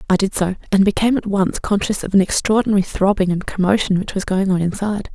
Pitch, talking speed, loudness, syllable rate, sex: 195 Hz, 220 wpm, -18 LUFS, 6.4 syllables/s, female